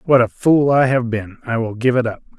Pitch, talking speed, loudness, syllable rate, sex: 125 Hz, 275 wpm, -17 LUFS, 5.2 syllables/s, male